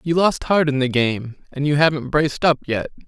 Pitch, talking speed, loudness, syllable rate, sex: 140 Hz, 235 wpm, -19 LUFS, 5.4 syllables/s, male